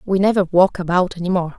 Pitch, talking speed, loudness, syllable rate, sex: 180 Hz, 225 wpm, -17 LUFS, 6.1 syllables/s, female